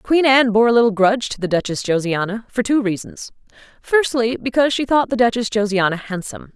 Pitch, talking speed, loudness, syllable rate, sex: 225 Hz, 190 wpm, -18 LUFS, 6.1 syllables/s, female